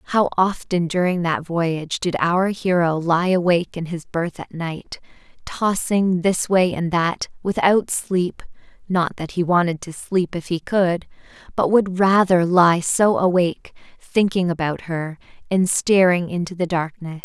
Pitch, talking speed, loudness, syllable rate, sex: 175 Hz, 155 wpm, -20 LUFS, 4.1 syllables/s, female